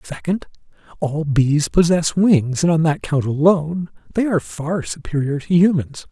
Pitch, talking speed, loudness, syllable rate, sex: 155 Hz, 155 wpm, -18 LUFS, 4.6 syllables/s, male